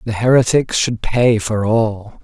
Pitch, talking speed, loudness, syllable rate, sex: 115 Hz, 160 wpm, -16 LUFS, 3.8 syllables/s, male